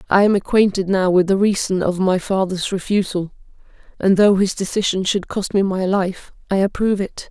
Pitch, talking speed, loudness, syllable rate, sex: 190 Hz, 190 wpm, -18 LUFS, 5.3 syllables/s, female